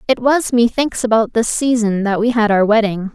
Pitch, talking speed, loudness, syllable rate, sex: 225 Hz, 210 wpm, -15 LUFS, 5.0 syllables/s, female